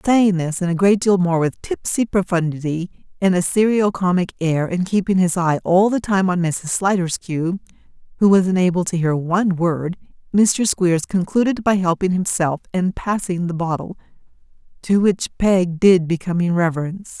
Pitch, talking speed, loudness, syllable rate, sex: 180 Hz, 165 wpm, -18 LUFS, 4.8 syllables/s, female